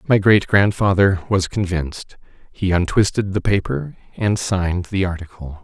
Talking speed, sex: 130 wpm, male